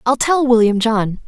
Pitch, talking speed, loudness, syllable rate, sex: 235 Hz, 190 wpm, -15 LUFS, 4.5 syllables/s, female